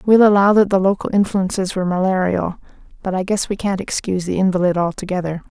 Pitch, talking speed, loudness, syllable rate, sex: 190 Hz, 185 wpm, -18 LUFS, 6.3 syllables/s, female